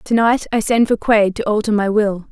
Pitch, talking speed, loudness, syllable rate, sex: 215 Hz, 260 wpm, -16 LUFS, 5.1 syllables/s, female